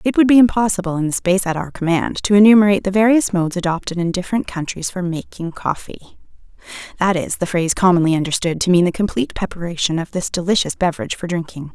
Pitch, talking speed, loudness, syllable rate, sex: 185 Hz, 200 wpm, -17 LUFS, 6.9 syllables/s, female